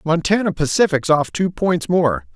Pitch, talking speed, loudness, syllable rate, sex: 160 Hz, 155 wpm, -18 LUFS, 4.6 syllables/s, male